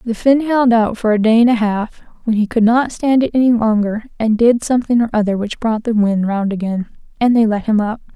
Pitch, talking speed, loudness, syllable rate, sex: 225 Hz, 250 wpm, -15 LUFS, 5.5 syllables/s, female